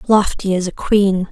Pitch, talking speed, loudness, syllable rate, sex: 195 Hz, 185 wpm, -17 LUFS, 4.4 syllables/s, female